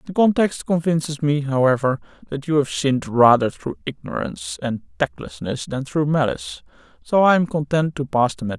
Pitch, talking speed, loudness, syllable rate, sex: 135 Hz, 180 wpm, -20 LUFS, 5.6 syllables/s, male